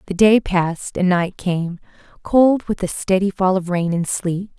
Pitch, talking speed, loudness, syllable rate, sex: 185 Hz, 195 wpm, -18 LUFS, 4.3 syllables/s, female